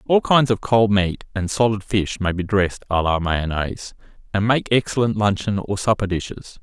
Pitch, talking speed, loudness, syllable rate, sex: 100 Hz, 190 wpm, -20 LUFS, 5.1 syllables/s, male